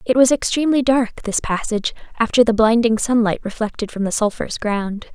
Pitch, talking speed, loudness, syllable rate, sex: 225 Hz, 175 wpm, -18 LUFS, 5.9 syllables/s, female